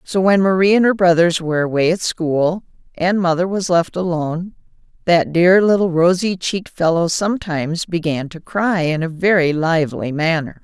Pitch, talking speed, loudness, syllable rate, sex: 175 Hz, 170 wpm, -17 LUFS, 5.0 syllables/s, female